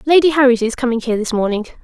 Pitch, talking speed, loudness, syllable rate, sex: 250 Hz, 230 wpm, -15 LUFS, 7.7 syllables/s, female